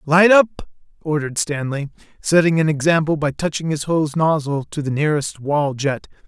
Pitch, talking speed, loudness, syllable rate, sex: 150 Hz, 160 wpm, -19 LUFS, 5.3 syllables/s, male